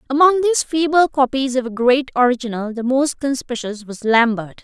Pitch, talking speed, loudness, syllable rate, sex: 260 Hz, 170 wpm, -17 LUFS, 5.6 syllables/s, female